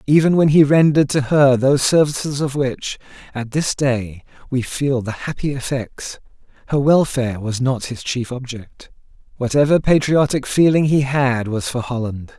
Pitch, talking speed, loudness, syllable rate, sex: 135 Hz, 160 wpm, -18 LUFS, 4.7 syllables/s, male